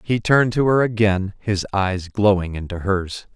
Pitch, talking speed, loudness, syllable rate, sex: 100 Hz, 180 wpm, -20 LUFS, 4.5 syllables/s, male